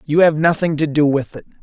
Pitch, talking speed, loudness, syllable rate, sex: 155 Hz, 260 wpm, -16 LUFS, 5.8 syllables/s, male